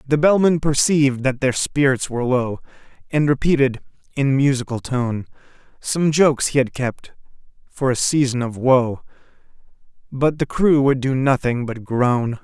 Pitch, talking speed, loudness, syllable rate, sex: 135 Hz, 150 wpm, -19 LUFS, 4.6 syllables/s, male